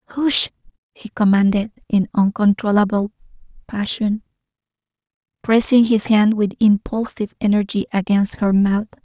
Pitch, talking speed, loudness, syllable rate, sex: 210 Hz, 100 wpm, -18 LUFS, 4.9 syllables/s, female